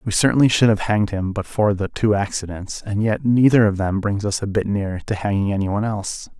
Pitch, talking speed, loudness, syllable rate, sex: 105 Hz, 245 wpm, -20 LUFS, 6.1 syllables/s, male